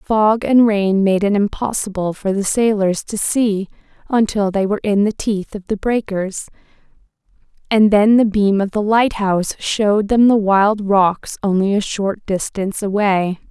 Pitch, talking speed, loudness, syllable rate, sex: 205 Hz, 165 wpm, -16 LUFS, 4.4 syllables/s, female